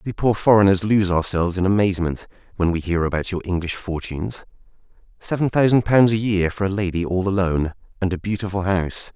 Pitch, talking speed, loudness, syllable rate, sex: 95 Hz, 185 wpm, -20 LUFS, 6.1 syllables/s, male